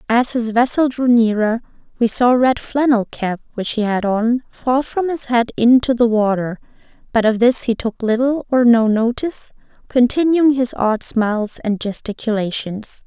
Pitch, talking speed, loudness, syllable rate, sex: 235 Hz, 170 wpm, -17 LUFS, 4.6 syllables/s, female